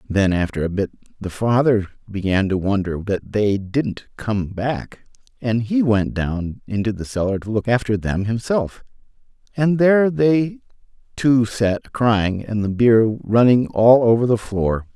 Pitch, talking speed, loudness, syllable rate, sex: 110 Hz, 160 wpm, -19 LUFS, 4.1 syllables/s, male